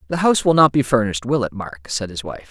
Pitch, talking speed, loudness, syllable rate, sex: 115 Hz, 290 wpm, -18 LUFS, 6.6 syllables/s, male